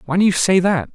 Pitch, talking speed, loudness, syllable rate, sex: 175 Hz, 320 wpm, -16 LUFS, 6.4 syllables/s, male